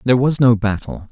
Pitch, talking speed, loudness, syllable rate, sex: 120 Hz, 215 wpm, -16 LUFS, 5.9 syllables/s, male